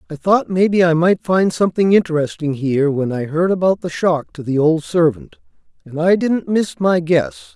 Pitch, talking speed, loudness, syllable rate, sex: 170 Hz, 200 wpm, -17 LUFS, 5.1 syllables/s, male